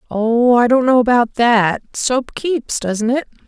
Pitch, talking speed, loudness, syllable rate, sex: 240 Hz, 175 wpm, -15 LUFS, 3.6 syllables/s, female